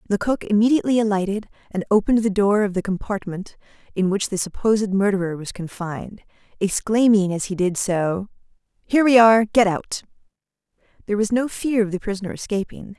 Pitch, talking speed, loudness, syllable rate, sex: 205 Hz, 160 wpm, -20 LUFS, 6.0 syllables/s, female